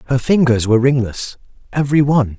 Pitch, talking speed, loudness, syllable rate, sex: 130 Hz, 150 wpm, -15 LUFS, 6.5 syllables/s, male